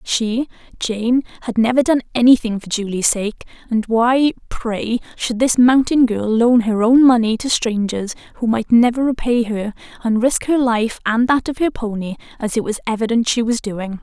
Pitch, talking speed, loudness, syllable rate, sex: 230 Hz, 185 wpm, -17 LUFS, 4.7 syllables/s, female